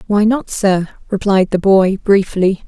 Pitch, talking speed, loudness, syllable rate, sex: 195 Hz, 155 wpm, -14 LUFS, 4.1 syllables/s, female